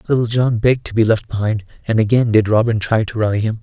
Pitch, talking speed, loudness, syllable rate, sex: 110 Hz, 250 wpm, -16 LUFS, 6.5 syllables/s, male